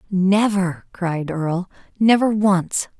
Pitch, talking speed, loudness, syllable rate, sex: 190 Hz, 100 wpm, -19 LUFS, 3.4 syllables/s, female